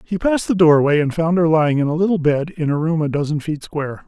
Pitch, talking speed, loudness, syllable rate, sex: 160 Hz, 280 wpm, -17 LUFS, 6.3 syllables/s, male